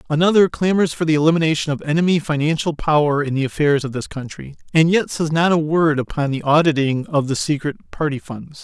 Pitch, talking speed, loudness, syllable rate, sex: 155 Hz, 200 wpm, -18 LUFS, 5.8 syllables/s, male